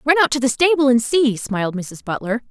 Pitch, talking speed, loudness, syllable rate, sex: 250 Hz, 240 wpm, -18 LUFS, 5.6 syllables/s, female